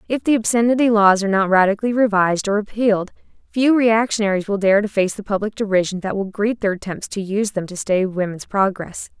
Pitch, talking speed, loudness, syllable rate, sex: 205 Hz, 200 wpm, -18 LUFS, 6.1 syllables/s, female